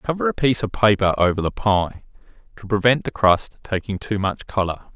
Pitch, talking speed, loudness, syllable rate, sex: 105 Hz, 195 wpm, -20 LUFS, 5.4 syllables/s, male